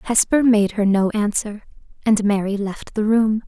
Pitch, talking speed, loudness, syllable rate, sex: 210 Hz, 175 wpm, -19 LUFS, 4.4 syllables/s, female